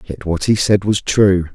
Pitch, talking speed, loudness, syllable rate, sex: 95 Hz, 235 wpm, -15 LUFS, 4.4 syllables/s, male